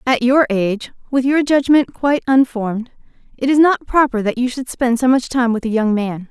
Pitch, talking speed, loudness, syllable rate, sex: 250 Hz, 220 wpm, -16 LUFS, 5.3 syllables/s, female